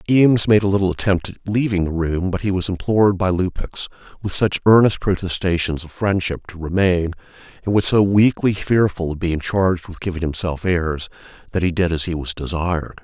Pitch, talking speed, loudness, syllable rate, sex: 90 Hz, 195 wpm, -19 LUFS, 5.5 syllables/s, male